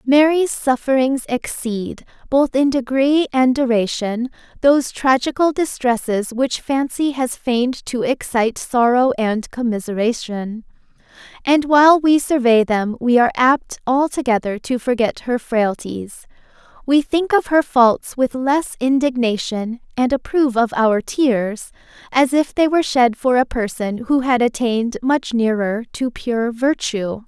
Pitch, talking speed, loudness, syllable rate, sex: 250 Hz, 135 wpm, -18 LUFS, 4.2 syllables/s, female